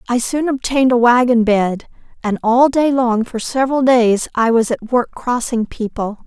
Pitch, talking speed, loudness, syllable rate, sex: 240 Hz, 180 wpm, -16 LUFS, 4.7 syllables/s, female